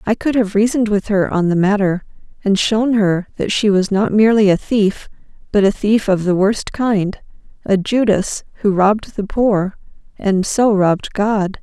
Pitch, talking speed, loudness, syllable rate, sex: 205 Hz, 185 wpm, -16 LUFS, 4.6 syllables/s, female